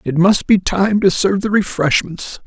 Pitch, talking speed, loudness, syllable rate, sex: 190 Hz, 195 wpm, -15 LUFS, 4.7 syllables/s, male